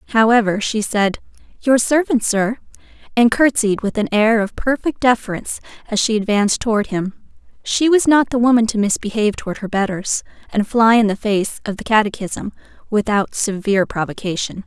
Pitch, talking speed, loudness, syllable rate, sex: 220 Hz, 165 wpm, -17 LUFS, 5.4 syllables/s, female